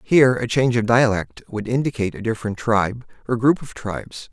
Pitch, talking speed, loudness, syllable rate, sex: 120 Hz, 195 wpm, -20 LUFS, 6.1 syllables/s, male